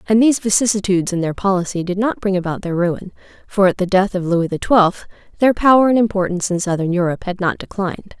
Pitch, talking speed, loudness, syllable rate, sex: 190 Hz, 220 wpm, -17 LUFS, 6.4 syllables/s, female